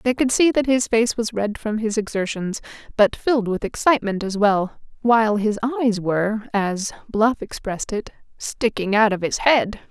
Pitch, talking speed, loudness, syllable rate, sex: 215 Hz, 180 wpm, -20 LUFS, 4.9 syllables/s, female